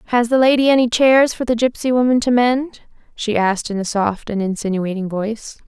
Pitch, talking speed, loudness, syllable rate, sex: 230 Hz, 200 wpm, -17 LUFS, 5.5 syllables/s, female